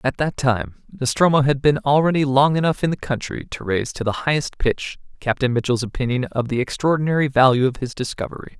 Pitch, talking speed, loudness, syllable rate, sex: 135 Hz, 195 wpm, -20 LUFS, 6.0 syllables/s, male